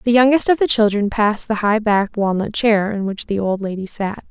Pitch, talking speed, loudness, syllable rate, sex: 215 Hz, 235 wpm, -17 LUFS, 5.5 syllables/s, female